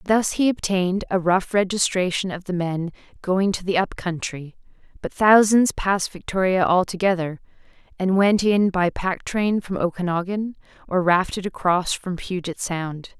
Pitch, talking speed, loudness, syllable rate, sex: 185 Hz, 150 wpm, -21 LUFS, 4.6 syllables/s, female